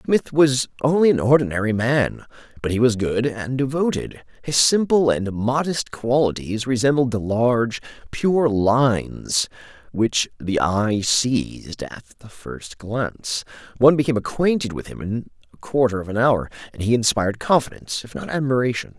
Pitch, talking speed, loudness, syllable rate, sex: 120 Hz, 150 wpm, -20 LUFS, 4.8 syllables/s, male